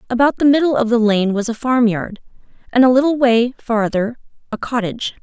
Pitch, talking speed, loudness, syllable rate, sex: 235 Hz, 185 wpm, -16 LUFS, 5.6 syllables/s, female